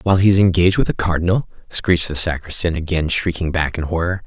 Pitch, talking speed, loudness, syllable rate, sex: 85 Hz, 210 wpm, -18 LUFS, 6.6 syllables/s, male